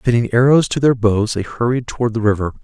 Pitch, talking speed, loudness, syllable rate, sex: 115 Hz, 230 wpm, -16 LUFS, 6.0 syllables/s, male